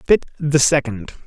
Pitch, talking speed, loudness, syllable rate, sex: 140 Hz, 145 wpm, -17 LUFS, 4.2 syllables/s, male